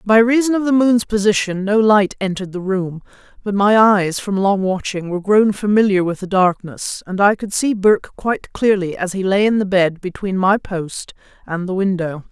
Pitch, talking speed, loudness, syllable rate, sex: 200 Hz, 205 wpm, -17 LUFS, 5.0 syllables/s, female